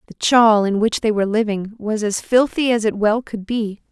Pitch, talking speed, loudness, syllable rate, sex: 215 Hz, 230 wpm, -18 LUFS, 5.0 syllables/s, female